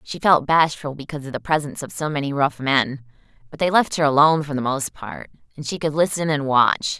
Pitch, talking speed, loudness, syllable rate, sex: 145 Hz, 230 wpm, -20 LUFS, 5.8 syllables/s, female